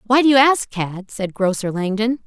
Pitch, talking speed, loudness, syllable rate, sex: 220 Hz, 210 wpm, -18 LUFS, 4.8 syllables/s, female